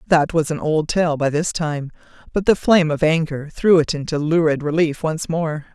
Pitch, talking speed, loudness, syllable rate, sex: 160 Hz, 210 wpm, -19 LUFS, 4.9 syllables/s, female